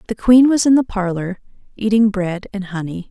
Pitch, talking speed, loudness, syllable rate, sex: 205 Hz, 195 wpm, -16 LUFS, 5.1 syllables/s, female